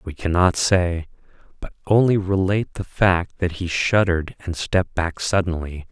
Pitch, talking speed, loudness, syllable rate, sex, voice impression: 90 Hz, 150 wpm, -21 LUFS, 4.7 syllables/s, male, very masculine, very adult-like, very middle-aged, very thick, very tensed, very powerful, bright, hard, muffled, fluent, very cool, intellectual, sincere, very calm, very mature, very friendly, very reassuring, very unique, very wild, slightly sweet, lively, kind